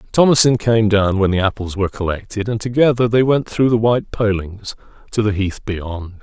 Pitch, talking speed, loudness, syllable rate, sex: 105 Hz, 195 wpm, -17 LUFS, 5.4 syllables/s, male